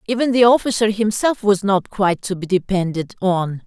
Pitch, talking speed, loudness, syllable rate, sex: 200 Hz, 180 wpm, -18 LUFS, 5.3 syllables/s, female